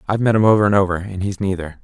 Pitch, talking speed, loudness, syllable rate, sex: 100 Hz, 295 wpm, -17 LUFS, 7.8 syllables/s, male